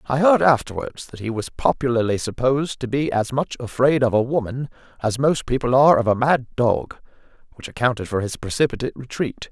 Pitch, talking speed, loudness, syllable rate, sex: 125 Hz, 190 wpm, -21 LUFS, 5.7 syllables/s, male